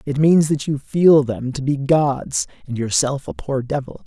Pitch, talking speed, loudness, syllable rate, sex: 140 Hz, 205 wpm, -19 LUFS, 4.3 syllables/s, male